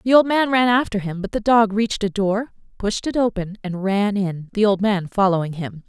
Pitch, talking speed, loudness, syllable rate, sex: 205 Hz, 235 wpm, -20 LUFS, 5.2 syllables/s, female